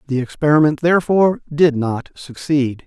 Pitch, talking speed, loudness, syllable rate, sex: 145 Hz, 125 wpm, -16 LUFS, 5.1 syllables/s, male